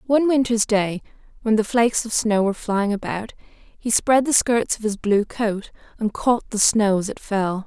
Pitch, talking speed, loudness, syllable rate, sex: 220 Hz, 205 wpm, -20 LUFS, 4.5 syllables/s, female